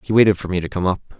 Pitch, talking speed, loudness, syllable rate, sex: 95 Hz, 350 wpm, -19 LUFS, 7.3 syllables/s, male